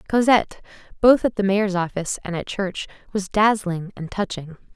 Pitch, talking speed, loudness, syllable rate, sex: 195 Hz, 165 wpm, -21 LUFS, 5.1 syllables/s, female